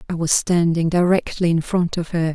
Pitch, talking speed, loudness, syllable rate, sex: 170 Hz, 205 wpm, -19 LUFS, 5.1 syllables/s, female